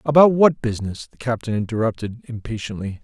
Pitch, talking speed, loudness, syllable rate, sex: 115 Hz, 140 wpm, -21 LUFS, 5.9 syllables/s, male